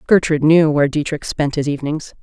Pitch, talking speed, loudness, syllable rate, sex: 150 Hz, 190 wpm, -17 LUFS, 6.4 syllables/s, female